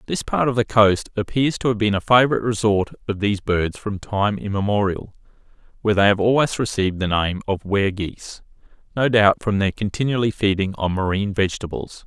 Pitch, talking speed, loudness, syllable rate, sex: 105 Hz, 185 wpm, -20 LUFS, 5.8 syllables/s, male